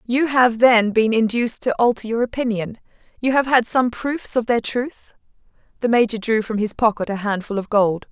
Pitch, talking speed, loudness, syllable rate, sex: 230 Hz, 200 wpm, -19 LUFS, 5.1 syllables/s, female